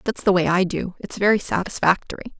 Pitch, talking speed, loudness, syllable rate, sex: 190 Hz, 175 wpm, -21 LUFS, 6.0 syllables/s, female